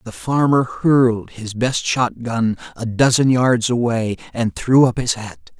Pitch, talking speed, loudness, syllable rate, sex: 115 Hz, 160 wpm, -18 LUFS, 3.9 syllables/s, male